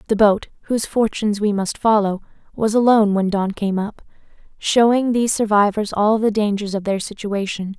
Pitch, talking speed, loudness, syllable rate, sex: 210 Hz, 170 wpm, -18 LUFS, 5.3 syllables/s, female